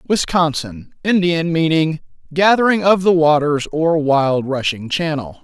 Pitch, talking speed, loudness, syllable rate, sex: 160 Hz, 110 wpm, -16 LUFS, 4.2 syllables/s, male